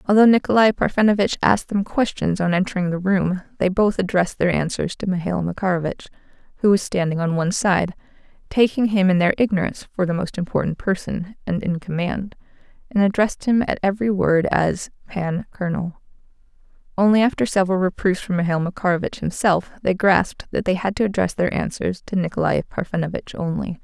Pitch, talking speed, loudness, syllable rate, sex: 190 Hz, 170 wpm, -20 LUFS, 5.9 syllables/s, female